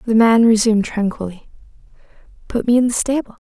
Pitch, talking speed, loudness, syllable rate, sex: 225 Hz, 155 wpm, -16 LUFS, 6.1 syllables/s, female